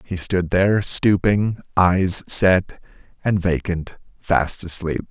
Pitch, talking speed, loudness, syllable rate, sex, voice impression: 90 Hz, 120 wpm, -19 LUFS, 3.4 syllables/s, male, very masculine, slightly old, very thick, tensed, very powerful, bright, soft, muffled, fluent, raspy, cool, intellectual, slightly refreshing, sincere, calm, very mature, very friendly, very reassuring, very unique, slightly elegant, wild, sweet, lively, very kind, slightly modest